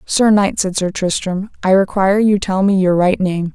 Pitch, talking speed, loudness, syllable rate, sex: 190 Hz, 220 wpm, -15 LUFS, 4.8 syllables/s, female